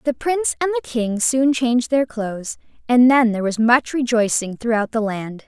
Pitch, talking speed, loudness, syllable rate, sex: 240 Hz, 195 wpm, -19 LUFS, 5.2 syllables/s, female